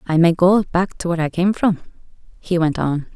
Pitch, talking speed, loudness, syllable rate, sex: 175 Hz, 230 wpm, -18 LUFS, 5.4 syllables/s, female